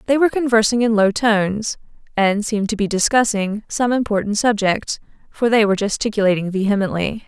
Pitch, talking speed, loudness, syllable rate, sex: 215 Hz, 155 wpm, -18 LUFS, 5.8 syllables/s, female